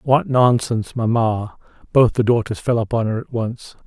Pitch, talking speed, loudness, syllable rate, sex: 115 Hz, 170 wpm, -19 LUFS, 4.7 syllables/s, male